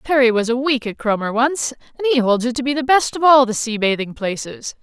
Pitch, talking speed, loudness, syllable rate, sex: 250 Hz, 260 wpm, -18 LUFS, 5.8 syllables/s, female